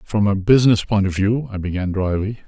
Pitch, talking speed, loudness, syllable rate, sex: 100 Hz, 220 wpm, -18 LUFS, 5.7 syllables/s, male